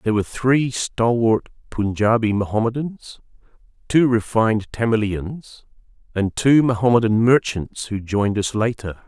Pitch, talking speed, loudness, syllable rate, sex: 115 Hz, 110 wpm, -19 LUFS, 4.6 syllables/s, male